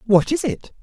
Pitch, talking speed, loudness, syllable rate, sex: 235 Hz, 215 wpm, -20 LUFS, 4.7 syllables/s, female